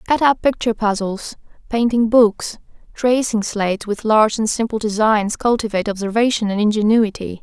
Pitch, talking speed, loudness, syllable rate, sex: 220 Hz, 135 wpm, -17 LUFS, 5.3 syllables/s, female